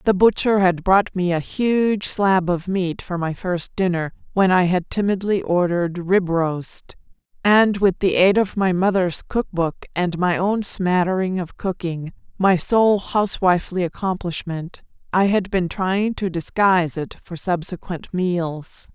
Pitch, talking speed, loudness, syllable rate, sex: 185 Hz, 160 wpm, -20 LUFS, 4.1 syllables/s, female